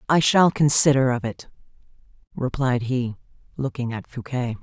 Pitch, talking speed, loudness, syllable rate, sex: 125 Hz, 130 wpm, -22 LUFS, 4.7 syllables/s, female